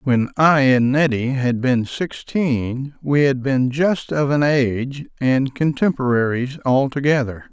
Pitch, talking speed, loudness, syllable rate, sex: 135 Hz, 135 wpm, -19 LUFS, 3.9 syllables/s, male